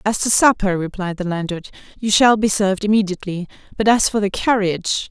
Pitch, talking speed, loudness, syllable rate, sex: 200 Hz, 190 wpm, -18 LUFS, 5.9 syllables/s, female